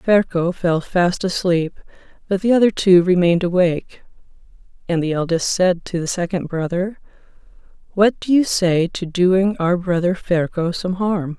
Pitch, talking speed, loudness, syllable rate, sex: 180 Hz, 155 wpm, -18 LUFS, 4.5 syllables/s, female